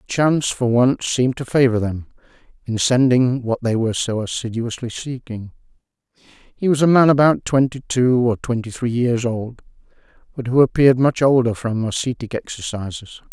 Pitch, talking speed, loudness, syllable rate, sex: 120 Hz, 160 wpm, -18 LUFS, 5.1 syllables/s, male